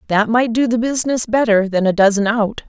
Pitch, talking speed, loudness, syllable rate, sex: 225 Hz, 225 wpm, -16 LUFS, 5.7 syllables/s, female